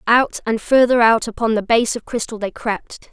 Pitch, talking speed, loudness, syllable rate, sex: 225 Hz, 210 wpm, -18 LUFS, 4.8 syllables/s, female